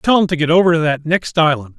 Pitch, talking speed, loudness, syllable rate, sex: 160 Hz, 300 wpm, -15 LUFS, 6.4 syllables/s, male